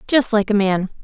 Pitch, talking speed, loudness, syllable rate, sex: 210 Hz, 230 wpm, -17 LUFS, 5.1 syllables/s, female